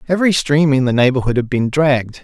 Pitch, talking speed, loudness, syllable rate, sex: 140 Hz, 215 wpm, -15 LUFS, 6.3 syllables/s, male